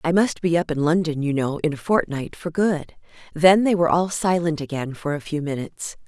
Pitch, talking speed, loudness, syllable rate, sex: 160 Hz, 225 wpm, -22 LUFS, 5.5 syllables/s, female